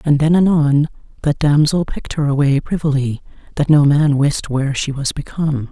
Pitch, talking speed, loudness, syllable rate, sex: 145 Hz, 180 wpm, -16 LUFS, 5.5 syllables/s, female